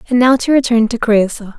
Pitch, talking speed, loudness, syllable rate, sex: 235 Hz, 225 wpm, -13 LUFS, 5.8 syllables/s, female